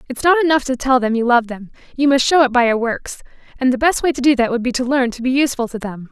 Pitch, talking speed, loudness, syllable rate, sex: 255 Hz, 305 wpm, -16 LUFS, 6.5 syllables/s, female